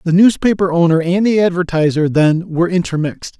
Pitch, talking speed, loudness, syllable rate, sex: 175 Hz, 160 wpm, -14 LUFS, 5.9 syllables/s, male